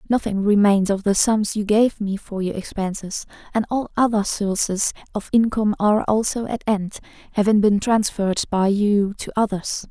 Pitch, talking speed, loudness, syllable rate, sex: 205 Hz, 170 wpm, -20 LUFS, 5.0 syllables/s, female